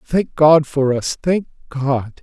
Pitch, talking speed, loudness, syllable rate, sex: 145 Hz, 160 wpm, -17 LUFS, 3.3 syllables/s, male